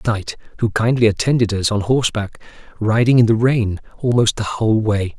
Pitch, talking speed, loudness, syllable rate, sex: 110 Hz, 175 wpm, -17 LUFS, 5.5 syllables/s, male